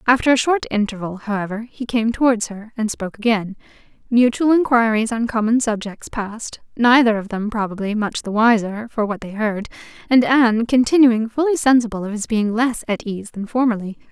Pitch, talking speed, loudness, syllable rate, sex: 225 Hz, 180 wpm, -19 LUFS, 5.4 syllables/s, female